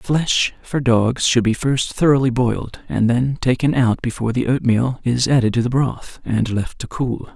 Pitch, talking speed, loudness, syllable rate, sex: 125 Hz, 195 wpm, -18 LUFS, 4.5 syllables/s, male